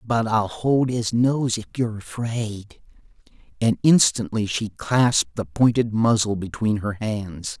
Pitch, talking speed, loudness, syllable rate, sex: 110 Hz, 140 wpm, -22 LUFS, 4.0 syllables/s, male